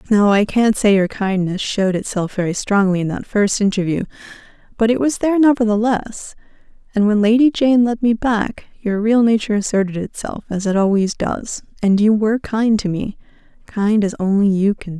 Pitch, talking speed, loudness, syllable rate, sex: 210 Hz, 190 wpm, -17 LUFS, 5.3 syllables/s, female